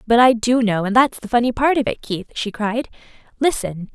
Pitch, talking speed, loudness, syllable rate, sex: 230 Hz, 230 wpm, -19 LUFS, 5.2 syllables/s, female